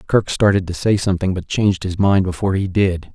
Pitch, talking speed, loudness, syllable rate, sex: 95 Hz, 230 wpm, -18 LUFS, 6.0 syllables/s, male